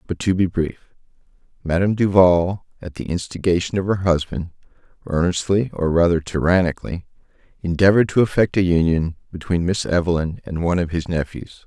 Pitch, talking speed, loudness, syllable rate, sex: 90 Hz, 150 wpm, -20 LUFS, 5.7 syllables/s, male